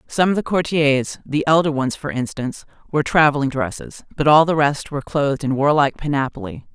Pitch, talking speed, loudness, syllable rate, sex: 145 Hz, 170 wpm, -19 LUFS, 5.5 syllables/s, female